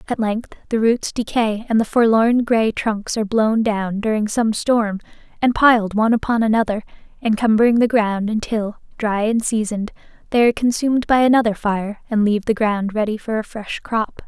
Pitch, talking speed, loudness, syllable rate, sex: 220 Hz, 180 wpm, -18 LUFS, 5.2 syllables/s, female